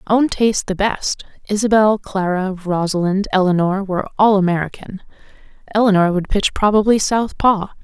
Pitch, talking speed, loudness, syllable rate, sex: 200 Hz, 125 wpm, -17 LUFS, 5.3 syllables/s, female